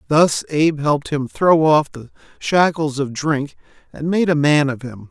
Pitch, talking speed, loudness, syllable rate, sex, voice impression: 150 Hz, 190 wpm, -17 LUFS, 4.5 syllables/s, male, masculine, adult-like, tensed, powerful, bright, slightly muffled, raspy, slightly mature, friendly, unique, wild, lively, slightly intense